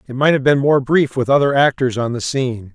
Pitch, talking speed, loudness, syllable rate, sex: 135 Hz, 260 wpm, -16 LUFS, 5.8 syllables/s, male